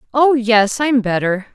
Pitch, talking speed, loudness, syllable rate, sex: 235 Hz, 155 wpm, -15 LUFS, 4.1 syllables/s, female